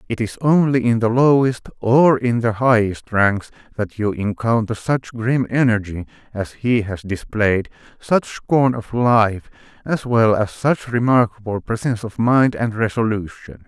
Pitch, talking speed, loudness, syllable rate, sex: 115 Hz, 155 wpm, -18 LUFS, 4.2 syllables/s, male